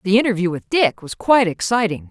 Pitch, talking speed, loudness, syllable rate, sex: 200 Hz, 200 wpm, -18 LUFS, 6.0 syllables/s, female